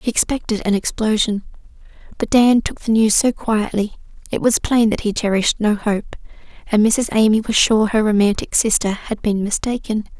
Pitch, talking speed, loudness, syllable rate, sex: 215 Hz, 175 wpm, -17 LUFS, 5.2 syllables/s, female